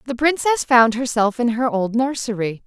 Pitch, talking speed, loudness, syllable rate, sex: 240 Hz, 180 wpm, -18 LUFS, 4.8 syllables/s, female